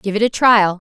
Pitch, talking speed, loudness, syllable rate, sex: 210 Hz, 265 wpm, -14 LUFS, 5.1 syllables/s, female